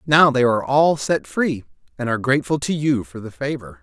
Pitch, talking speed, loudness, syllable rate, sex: 130 Hz, 220 wpm, -19 LUFS, 5.6 syllables/s, male